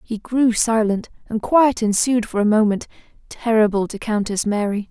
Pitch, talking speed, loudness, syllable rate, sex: 220 Hz, 160 wpm, -19 LUFS, 4.7 syllables/s, female